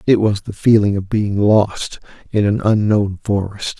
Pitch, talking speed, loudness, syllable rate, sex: 105 Hz, 175 wpm, -16 LUFS, 4.3 syllables/s, male